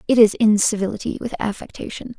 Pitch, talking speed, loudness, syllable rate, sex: 220 Hz, 135 wpm, -19 LUFS, 6.3 syllables/s, female